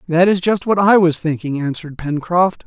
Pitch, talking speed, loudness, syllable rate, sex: 170 Hz, 200 wpm, -16 LUFS, 5.2 syllables/s, male